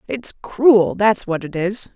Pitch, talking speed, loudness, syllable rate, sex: 205 Hz, 185 wpm, -17 LUFS, 3.6 syllables/s, female